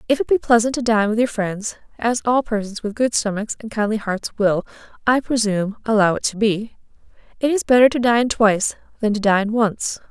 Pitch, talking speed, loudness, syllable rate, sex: 220 Hz, 210 wpm, -19 LUFS, 5.4 syllables/s, female